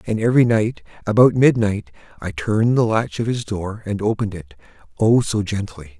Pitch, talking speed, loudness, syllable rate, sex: 105 Hz, 170 wpm, -19 LUFS, 5.3 syllables/s, male